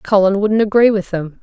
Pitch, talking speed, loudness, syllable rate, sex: 200 Hz, 210 wpm, -14 LUFS, 5.0 syllables/s, female